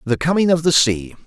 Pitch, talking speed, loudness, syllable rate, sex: 145 Hz, 235 wpm, -16 LUFS, 5.7 syllables/s, male